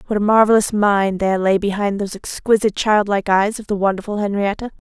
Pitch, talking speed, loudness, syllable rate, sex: 205 Hz, 185 wpm, -17 LUFS, 6.4 syllables/s, female